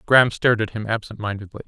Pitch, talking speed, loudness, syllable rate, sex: 110 Hz, 215 wpm, -21 LUFS, 7.4 syllables/s, male